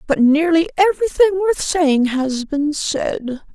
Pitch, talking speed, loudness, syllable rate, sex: 315 Hz, 135 wpm, -17 LUFS, 4.1 syllables/s, female